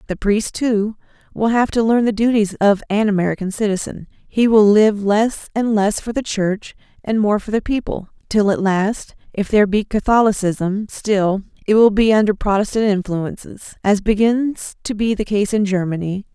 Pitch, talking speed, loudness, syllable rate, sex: 210 Hz, 180 wpm, -17 LUFS, 4.8 syllables/s, female